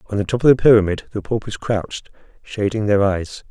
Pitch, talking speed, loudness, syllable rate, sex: 105 Hz, 205 wpm, -18 LUFS, 5.7 syllables/s, male